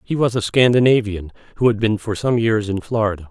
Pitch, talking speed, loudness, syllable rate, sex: 110 Hz, 220 wpm, -18 LUFS, 5.8 syllables/s, male